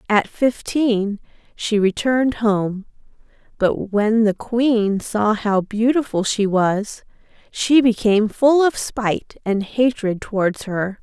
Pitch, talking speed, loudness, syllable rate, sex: 220 Hz, 125 wpm, -19 LUFS, 3.6 syllables/s, female